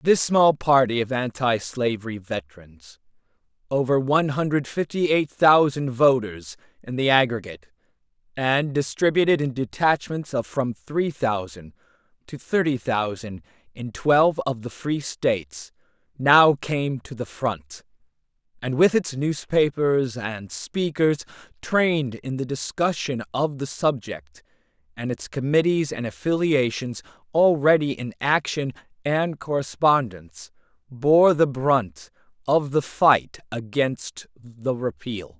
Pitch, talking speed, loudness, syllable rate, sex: 135 Hz, 120 wpm, -22 LUFS, 4.0 syllables/s, male